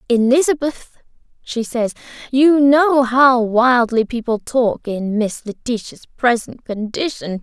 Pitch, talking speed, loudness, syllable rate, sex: 245 Hz, 115 wpm, -17 LUFS, 3.8 syllables/s, female